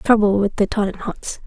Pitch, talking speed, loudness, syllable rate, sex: 205 Hz, 165 wpm, -20 LUFS, 5.0 syllables/s, female